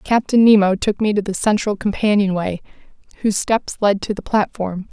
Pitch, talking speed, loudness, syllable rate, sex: 205 Hz, 170 wpm, -18 LUFS, 5.3 syllables/s, female